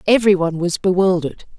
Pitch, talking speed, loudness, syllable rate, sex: 185 Hz, 115 wpm, -17 LUFS, 7.4 syllables/s, female